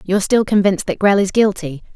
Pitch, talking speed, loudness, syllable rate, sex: 195 Hz, 215 wpm, -15 LUFS, 6.3 syllables/s, female